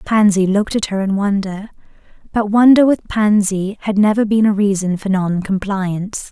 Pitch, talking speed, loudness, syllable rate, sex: 200 Hz, 170 wpm, -16 LUFS, 4.9 syllables/s, female